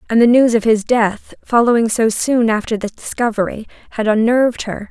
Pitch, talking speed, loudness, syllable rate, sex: 225 Hz, 185 wpm, -15 LUFS, 5.3 syllables/s, female